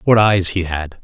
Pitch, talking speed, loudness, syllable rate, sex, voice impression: 90 Hz, 235 wpm, -16 LUFS, 4.4 syllables/s, male, very masculine, slightly old, very thick, tensed, very powerful, slightly dark, hard, slightly muffled, fluent, raspy, cool, intellectual, very sincere, very calm, friendly, reassuring, very unique, slightly elegant, wild, sweet, slightly strict, slightly intense, modest